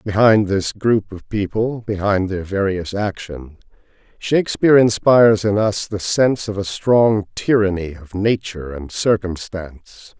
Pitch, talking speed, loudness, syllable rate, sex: 100 Hz, 135 wpm, -18 LUFS, 4.4 syllables/s, male